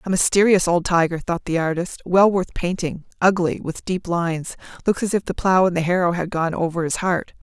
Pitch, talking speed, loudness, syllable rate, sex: 175 Hz, 200 wpm, -20 LUFS, 5.5 syllables/s, female